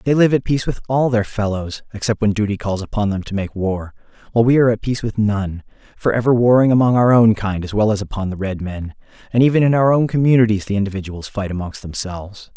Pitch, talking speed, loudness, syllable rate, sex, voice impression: 110 Hz, 230 wpm, -18 LUFS, 6.3 syllables/s, male, very masculine, very adult-like, thick, tensed, slightly powerful, slightly dark, slightly soft, clear, fluent, cool, intellectual, slightly refreshing, sincere, calm, slightly mature, friendly, reassuring, slightly unique, elegant, slightly wild, sweet, lively, kind, slightly modest